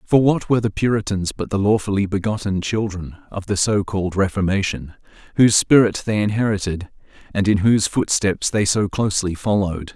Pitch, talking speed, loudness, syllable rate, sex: 100 Hz, 165 wpm, -19 LUFS, 5.6 syllables/s, male